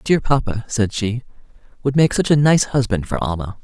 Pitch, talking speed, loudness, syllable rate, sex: 120 Hz, 200 wpm, -18 LUFS, 5.3 syllables/s, male